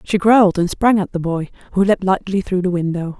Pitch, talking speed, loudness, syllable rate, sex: 185 Hz, 245 wpm, -17 LUFS, 5.6 syllables/s, female